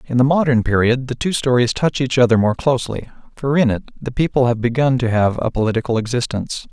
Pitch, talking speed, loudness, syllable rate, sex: 125 Hz, 215 wpm, -18 LUFS, 6.2 syllables/s, male